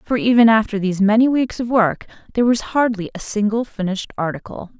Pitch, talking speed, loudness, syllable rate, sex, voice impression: 215 Hz, 190 wpm, -18 LUFS, 6.2 syllables/s, female, very feminine, adult-like, slightly middle-aged, thin, tensed, slightly powerful, bright, hard, clear, fluent, slightly cool, intellectual, refreshing, very sincere, calm, very friendly, reassuring, slightly unique, elegant, slightly wild, slightly sweet, lively, slightly strict, slightly intense, slightly sharp